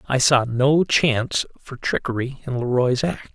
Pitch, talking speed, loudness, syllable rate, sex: 130 Hz, 180 wpm, -20 LUFS, 4.3 syllables/s, male